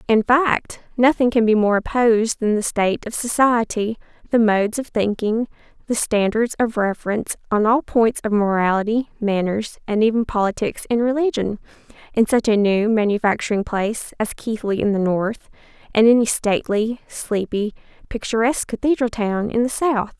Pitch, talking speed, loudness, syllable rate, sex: 220 Hz, 155 wpm, -19 LUFS, 5.1 syllables/s, female